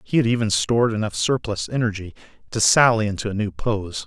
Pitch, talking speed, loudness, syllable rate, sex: 110 Hz, 190 wpm, -21 LUFS, 5.8 syllables/s, male